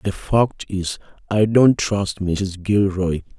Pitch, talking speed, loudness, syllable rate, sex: 100 Hz, 140 wpm, -19 LUFS, 3.2 syllables/s, male